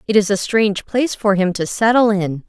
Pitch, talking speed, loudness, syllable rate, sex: 205 Hz, 240 wpm, -17 LUFS, 5.6 syllables/s, female